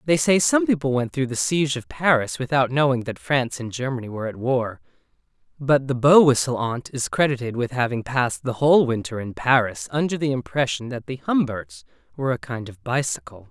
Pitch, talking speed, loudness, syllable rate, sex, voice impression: 130 Hz, 195 wpm, -22 LUFS, 5.7 syllables/s, male, masculine, slightly adult-like, fluent, slightly cool, refreshing, slightly sincere, slightly sweet